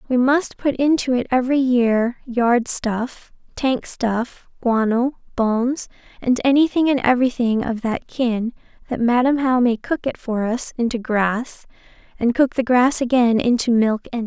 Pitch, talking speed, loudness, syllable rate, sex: 245 Hz, 165 wpm, -19 LUFS, 4.4 syllables/s, female